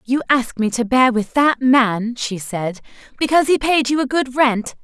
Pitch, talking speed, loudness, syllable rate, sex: 250 Hz, 210 wpm, -17 LUFS, 4.7 syllables/s, female